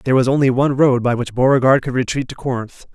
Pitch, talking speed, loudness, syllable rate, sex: 130 Hz, 245 wpm, -16 LUFS, 6.9 syllables/s, male